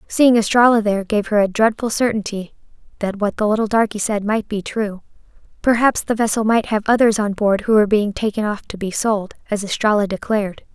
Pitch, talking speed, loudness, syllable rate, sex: 210 Hz, 200 wpm, -18 LUFS, 5.7 syllables/s, female